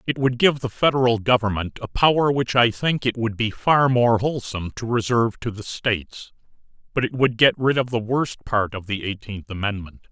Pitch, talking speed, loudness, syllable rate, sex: 120 Hz, 210 wpm, -21 LUFS, 5.3 syllables/s, male